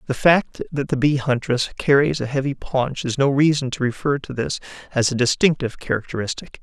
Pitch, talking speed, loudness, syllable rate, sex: 135 Hz, 190 wpm, -21 LUFS, 5.6 syllables/s, male